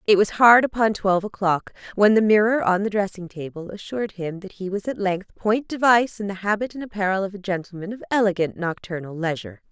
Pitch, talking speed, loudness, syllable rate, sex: 200 Hz, 210 wpm, -22 LUFS, 6.0 syllables/s, female